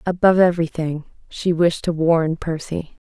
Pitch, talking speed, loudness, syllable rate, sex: 165 Hz, 155 wpm, -19 LUFS, 4.9 syllables/s, female